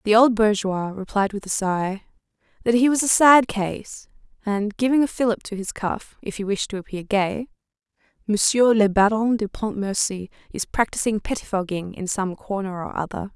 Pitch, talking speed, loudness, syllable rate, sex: 210 Hz, 175 wpm, -22 LUFS, 4.9 syllables/s, female